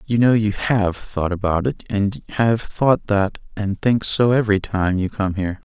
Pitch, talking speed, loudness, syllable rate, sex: 105 Hz, 200 wpm, -20 LUFS, 4.4 syllables/s, male